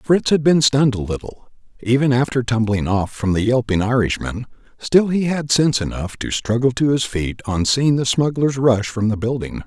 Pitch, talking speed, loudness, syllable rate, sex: 120 Hz, 200 wpm, -18 LUFS, 5.1 syllables/s, male